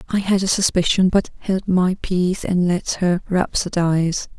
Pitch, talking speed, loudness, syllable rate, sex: 180 Hz, 165 wpm, -19 LUFS, 4.6 syllables/s, female